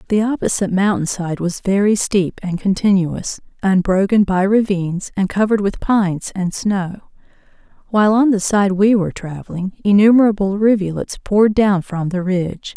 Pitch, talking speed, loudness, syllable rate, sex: 195 Hz, 145 wpm, -17 LUFS, 5.2 syllables/s, female